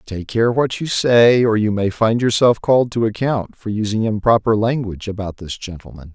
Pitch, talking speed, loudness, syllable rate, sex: 110 Hz, 195 wpm, -17 LUFS, 5.2 syllables/s, male